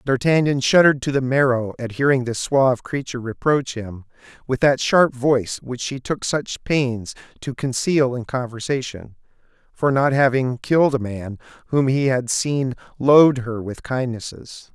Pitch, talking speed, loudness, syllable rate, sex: 130 Hz, 160 wpm, -20 LUFS, 4.6 syllables/s, male